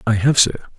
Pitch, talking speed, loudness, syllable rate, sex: 115 Hz, 230 wpm, -16 LUFS, 6.0 syllables/s, male